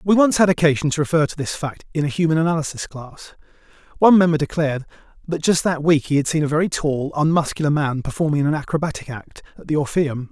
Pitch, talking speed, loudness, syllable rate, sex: 155 Hz, 215 wpm, -19 LUFS, 6.6 syllables/s, male